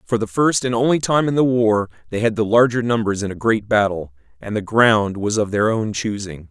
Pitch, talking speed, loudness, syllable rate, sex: 110 Hz, 240 wpm, -18 LUFS, 5.3 syllables/s, male